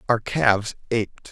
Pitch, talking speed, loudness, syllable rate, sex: 110 Hz, 135 wpm, -22 LUFS, 4.0 syllables/s, male